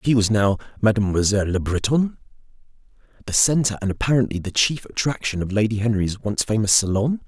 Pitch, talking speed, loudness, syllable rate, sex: 110 Hz, 155 wpm, -21 LUFS, 5.9 syllables/s, male